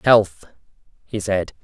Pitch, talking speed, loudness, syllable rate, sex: 100 Hz, 110 wpm, -21 LUFS, 3.1 syllables/s, male